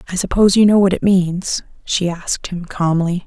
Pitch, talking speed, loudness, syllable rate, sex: 185 Hz, 200 wpm, -16 LUFS, 5.3 syllables/s, female